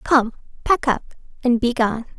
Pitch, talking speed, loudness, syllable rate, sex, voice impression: 245 Hz, 135 wpm, -20 LUFS, 5.5 syllables/s, female, feminine, very young, tensed, powerful, bright, soft, clear, cute, slightly refreshing, calm, friendly, sweet, lively